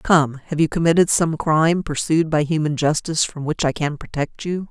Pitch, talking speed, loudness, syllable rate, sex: 160 Hz, 205 wpm, -20 LUFS, 5.1 syllables/s, female